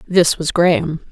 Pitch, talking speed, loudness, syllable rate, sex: 170 Hz, 160 wpm, -16 LUFS, 4.3 syllables/s, female